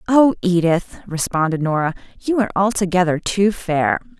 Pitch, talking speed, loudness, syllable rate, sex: 185 Hz, 130 wpm, -18 LUFS, 5.0 syllables/s, female